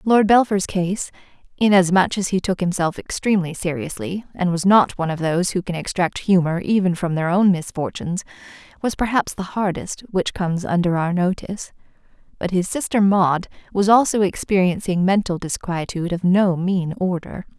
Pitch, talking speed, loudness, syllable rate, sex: 185 Hz, 160 wpm, -20 LUFS, 5.2 syllables/s, female